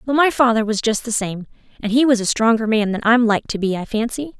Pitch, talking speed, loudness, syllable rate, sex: 230 Hz, 275 wpm, -18 LUFS, 5.9 syllables/s, female